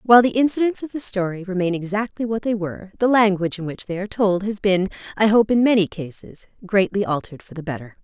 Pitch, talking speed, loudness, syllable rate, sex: 200 Hz, 225 wpm, -20 LUFS, 6.4 syllables/s, female